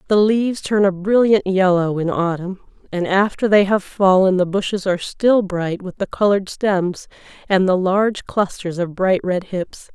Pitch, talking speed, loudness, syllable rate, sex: 190 Hz, 180 wpm, -18 LUFS, 4.6 syllables/s, female